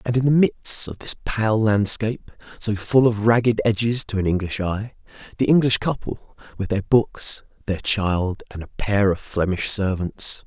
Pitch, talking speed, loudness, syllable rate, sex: 105 Hz, 180 wpm, -21 LUFS, 4.4 syllables/s, male